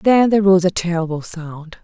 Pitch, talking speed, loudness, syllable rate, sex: 180 Hz, 195 wpm, -16 LUFS, 5.3 syllables/s, female